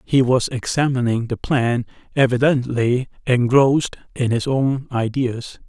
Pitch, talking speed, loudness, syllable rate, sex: 125 Hz, 115 wpm, -19 LUFS, 4.1 syllables/s, male